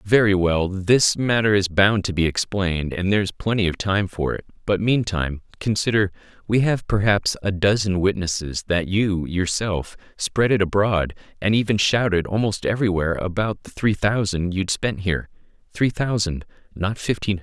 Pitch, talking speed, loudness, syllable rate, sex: 100 Hz, 165 wpm, -21 LUFS, 5.0 syllables/s, male